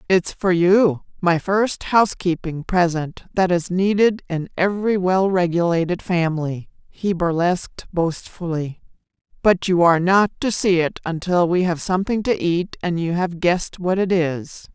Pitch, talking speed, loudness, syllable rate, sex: 180 Hz, 155 wpm, -20 LUFS, 4.5 syllables/s, female